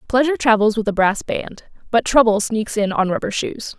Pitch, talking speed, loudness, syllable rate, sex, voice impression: 220 Hz, 205 wpm, -18 LUFS, 5.3 syllables/s, female, feminine, adult-like, tensed, slightly bright, clear, fluent, intellectual, friendly, unique, lively, slightly sharp